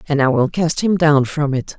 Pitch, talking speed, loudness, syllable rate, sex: 150 Hz, 270 wpm, -16 LUFS, 4.9 syllables/s, female